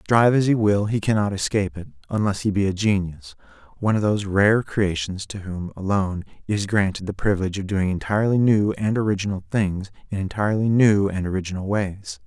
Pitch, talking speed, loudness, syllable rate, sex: 100 Hz, 180 wpm, -22 LUFS, 6.0 syllables/s, male